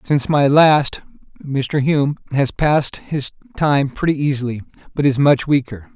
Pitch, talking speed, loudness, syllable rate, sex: 140 Hz, 150 wpm, -17 LUFS, 4.5 syllables/s, male